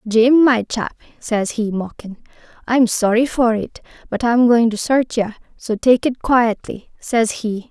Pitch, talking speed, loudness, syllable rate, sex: 230 Hz, 170 wpm, -17 LUFS, 3.7 syllables/s, female